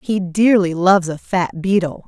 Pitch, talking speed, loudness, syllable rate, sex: 185 Hz, 175 wpm, -16 LUFS, 4.6 syllables/s, female